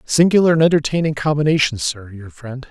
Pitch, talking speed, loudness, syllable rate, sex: 140 Hz, 155 wpm, -16 LUFS, 5.8 syllables/s, male